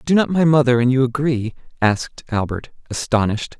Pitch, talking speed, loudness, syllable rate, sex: 130 Hz, 165 wpm, -18 LUFS, 5.7 syllables/s, male